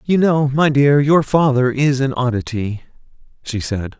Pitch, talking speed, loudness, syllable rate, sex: 135 Hz, 165 wpm, -16 LUFS, 4.3 syllables/s, male